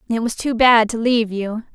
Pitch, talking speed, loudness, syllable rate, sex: 225 Hz, 240 wpm, -17 LUFS, 5.5 syllables/s, female